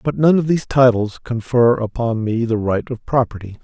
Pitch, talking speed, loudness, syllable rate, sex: 120 Hz, 200 wpm, -17 LUFS, 5.2 syllables/s, male